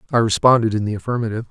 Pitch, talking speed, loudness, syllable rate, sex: 110 Hz, 200 wpm, -18 LUFS, 8.9 syllables/s, male